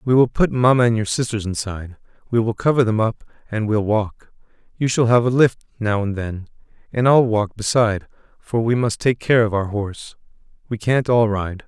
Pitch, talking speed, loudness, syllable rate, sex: 110 Hz, 205 wpm, -19 LUFS, 5.3 syllables/s, male